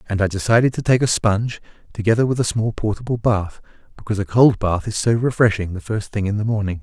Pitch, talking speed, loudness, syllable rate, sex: 105 Hz, 230 wpm, -19 LUFS, 6.3 syllables/s, male